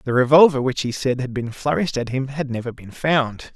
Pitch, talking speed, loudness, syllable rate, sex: 130 Hz, 235 wpm, -20 LUFS, 5.5 syllables/s, male